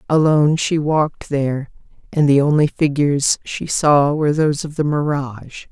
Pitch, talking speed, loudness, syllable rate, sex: 145 Hz, 160 wpm, -17 LUFS, 5.2 syllables/s, female